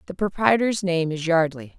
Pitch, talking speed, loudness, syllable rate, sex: 175 Hz, 170 wpm, -22 LUFS, 5.0 syllables/s, female